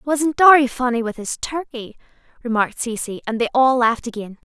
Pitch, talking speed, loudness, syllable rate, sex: 250 Hz, 175 wpm, -18 LUFS, 5.5 syllables/s, female